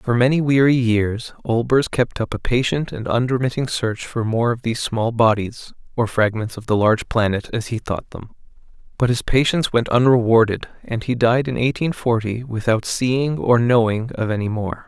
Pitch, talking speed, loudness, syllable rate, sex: 120 Hz, 185 wpm, -19 LUFS, 5.0 syllables/s, male